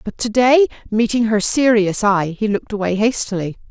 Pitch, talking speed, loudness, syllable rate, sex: 215 Hz, 180 wpm, -17 LUFS, 5.2 syllables/s, female